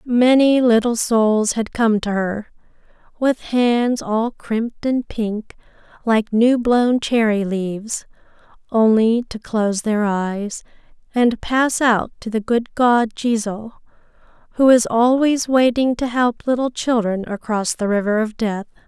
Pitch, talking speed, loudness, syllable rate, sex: 230 Hz, 140 wpm, -18 LUFS, 3.8 syllables/s, female